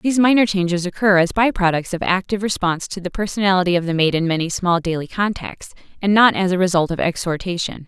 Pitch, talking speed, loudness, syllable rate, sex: 185 Hz, 215 wpm, -18 LUFS, 6.4 syllables/s, female